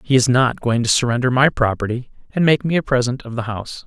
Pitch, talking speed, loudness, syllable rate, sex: 125 Hz, 250 wpm, -18 LUFS, 6.1 syllables/s, male